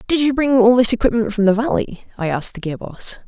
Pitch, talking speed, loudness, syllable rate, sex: 225 Hz, 255 wpm, -17 LUFS, 6.1 syllables/s, female